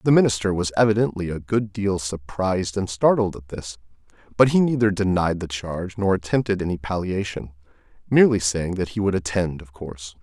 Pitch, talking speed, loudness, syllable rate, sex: 95 Hz, 175 wpm, -22 LUFS, 5.6 syllables/s, male